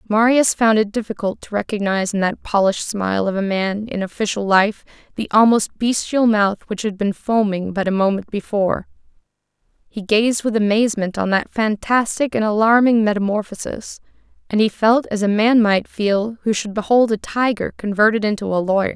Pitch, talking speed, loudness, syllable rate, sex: 210 Hz, 175 wpm, -18 LUFS, 5.3 syllables/s, female